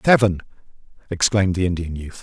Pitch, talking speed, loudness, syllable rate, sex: 95 Hz, 135 wpm, -20 LUFS, 6.4 syllables/s, male